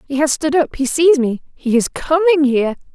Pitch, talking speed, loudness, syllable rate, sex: 285 Hz, 225 wpm, -16 LUFS, 5.2 syllables/s, female